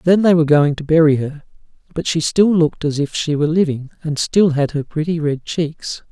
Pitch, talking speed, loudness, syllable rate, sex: 155 Hz, 225 wpm, -17 LUFS, 5.4 syllables/s, male